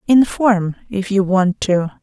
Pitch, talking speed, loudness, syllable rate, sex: 200 Hz, 150 wpm, -16 LUFS, 3.6 syllables/s, female